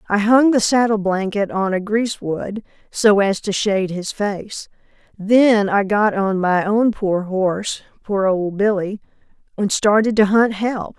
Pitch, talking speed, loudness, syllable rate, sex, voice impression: 205 Hz, 165 wpm, -18 LUFS, 4.1 syllables/s, female, feminine, adult-like, tensed, powerful, clear, fluent, calm, elegant, lively, sharp